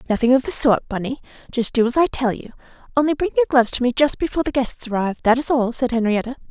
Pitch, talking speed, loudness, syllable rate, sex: 255 Hz, 240 wpm, -19 LUFS, 7.1 syllables/s, female